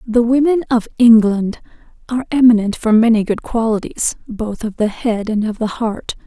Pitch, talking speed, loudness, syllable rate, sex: 225 Hz, 170 wpm, -16 LUFS, 4.9 syllables/s, female